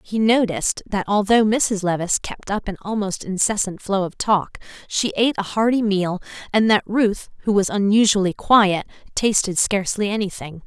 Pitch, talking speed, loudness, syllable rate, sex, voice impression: 205 Hz, 165 wpm, -20 LUFS, 5.0 syllables/s, female, feminine, adult-like, fluent, slightly refreshing, slightly friendly, slightly lively